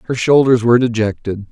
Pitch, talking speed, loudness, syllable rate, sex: 120 Hz, 160 wpm, -14 LUFS, 6.1 syllables/s, male